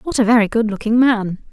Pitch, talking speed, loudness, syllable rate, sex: 225 Hz, 235 wpm, -16 LUFS, 5.6 syllables/s, female